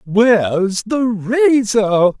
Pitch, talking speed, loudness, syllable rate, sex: 210 Hz, 80 wpm, -15 LUFS, 3.0 syllables/s, male